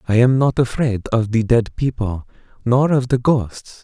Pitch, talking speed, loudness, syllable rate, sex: 120 Hz, 190 wpm, -18 LUFS, 4.3 syllables/s, male